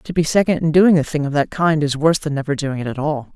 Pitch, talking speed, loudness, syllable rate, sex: 150 Hz, 320 wpm, -18 LUFS, 6.4 syllables/s, female